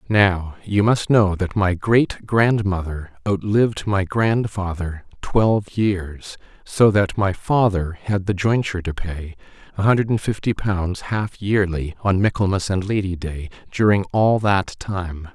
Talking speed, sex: 140 wpm, male